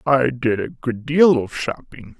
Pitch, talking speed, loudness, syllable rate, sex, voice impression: 130 Hz, 190 wpm, -19 LUFS, 3.9 syllables/s, male, masculine, very adult-like, slightly thick, cool, slightly intellectual, calm, slightly elegant